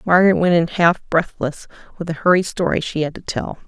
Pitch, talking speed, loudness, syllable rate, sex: 170 Hz, 210 wpm, -18 LUFS, 5.6 syllables/s, female